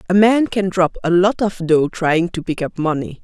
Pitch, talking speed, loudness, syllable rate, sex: 180 Hz, 240 wpm, -17 LUFS, 4.8 syllables/s, female